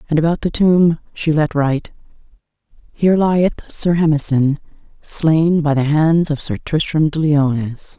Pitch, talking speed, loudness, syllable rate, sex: 155 Hz, 150 wpm, -16 LUFS, 4.4 syllables/s, female